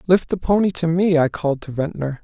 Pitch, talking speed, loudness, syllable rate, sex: 165 Hz, 240 wpm, -19 LUFS, 5.8 syllables/s, male